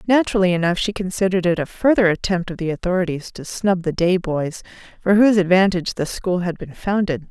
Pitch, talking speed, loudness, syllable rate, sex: 185 Hz, 195 wpm, -19 LUFS, 6.1 syllables/s, female